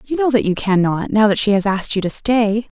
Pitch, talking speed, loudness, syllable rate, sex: 210 Hz, 280 wpm, -17 LUFS, 5.7 syllables/s, female